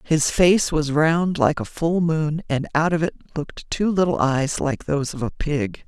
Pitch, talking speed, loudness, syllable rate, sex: 155 Hz, 215 wpm, -21 LUFS, 4.4 syllables/s, female